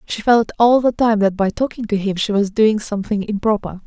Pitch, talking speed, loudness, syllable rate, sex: 215 Hz, 235 wpm, -17 LUFS, 5.5 syllables/s, female